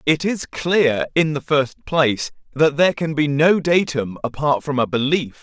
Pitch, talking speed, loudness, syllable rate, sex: 150 Hz, 190 wpm, -19 LUFS, 4.5 syllables/s, male